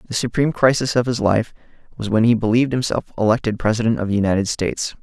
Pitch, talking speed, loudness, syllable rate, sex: 115 Hz, 205 wpm, -19 LUFS, 6.9 syllables/s, male